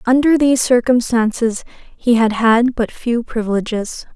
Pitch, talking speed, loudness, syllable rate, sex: 235 Hz, 130 wpm, -16 LUFS, 4.5 syllables/s, female